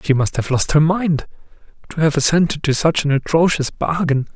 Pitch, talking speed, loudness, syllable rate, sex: 150 Hz, 195 wpm, -17 LUFS, 5.3 syllables/s, male